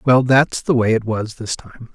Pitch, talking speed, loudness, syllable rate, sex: 120 Hz, 245 wpm, -18 LUFS, 4.4 syllables/s, male